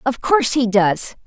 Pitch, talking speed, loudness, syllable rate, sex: 235 Hz, 190 wpm, -17 LUFS, 4.7 syllables/s, female